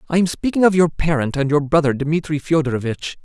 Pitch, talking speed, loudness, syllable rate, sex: 155 Hz, 205 wpm, -18 LUFS, 6.0 syllables/s, male